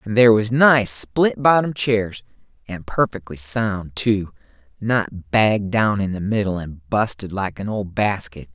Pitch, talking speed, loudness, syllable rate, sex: 105 Hz, 160 wpm, -19 LUFS, 4.1 syllables/s, male